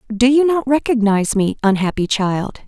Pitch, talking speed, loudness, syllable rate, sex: 230 Hz, 155 wpm, -16 LUFS, 5.0 syllables/s, female